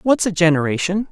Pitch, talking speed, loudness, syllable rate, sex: 185 Hz, 160 wpm, -17 LUFS, 5.9 syllables/s, male